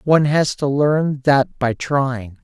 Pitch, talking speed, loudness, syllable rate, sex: 140 Hz, 175 wpm, -18 LUFS, 3.5 syllables/s, male